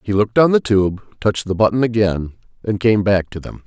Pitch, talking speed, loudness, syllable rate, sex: 105 Hz, 230 wpm, -17 LUFS, 5.5 syllables/s, male